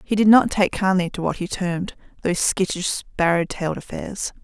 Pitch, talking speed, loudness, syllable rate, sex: 185 Hz, 190 wpm, -21 LUFS, 5.3 syllables/s, female